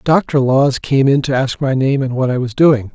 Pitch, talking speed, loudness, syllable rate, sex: 135 Hz, 265 wpm, -14 LUFS, 4.9 syllables/s, male